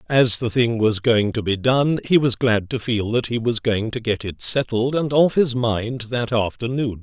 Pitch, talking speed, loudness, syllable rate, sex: 120 Hz, 230 wpm, -20 LUFS, 4.4 syllables/s, male